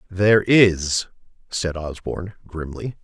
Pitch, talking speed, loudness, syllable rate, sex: 90 Hz, 100 wpm, -20 LUFS, 4.0 syllables/s, male